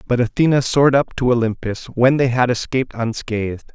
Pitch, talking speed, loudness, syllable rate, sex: 125 Hz, 175 wpm, -18 LUFS, 5.6 syllables/s, male